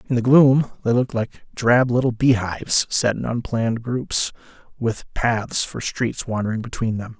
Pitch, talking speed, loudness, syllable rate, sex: 120 Hz, 165 wpm, -20 LUFS, 4.6 syllables/s, male